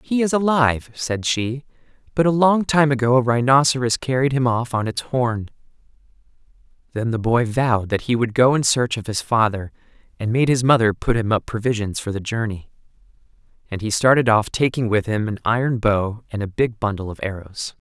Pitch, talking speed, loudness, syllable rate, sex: 120 Hz, 195 wpm, -20 LUFS, 5.4 syllables/s, male